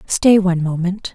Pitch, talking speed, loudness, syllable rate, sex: 185 Hz, 155 wpm, -16 LUFS, 4.9 syllables/s, female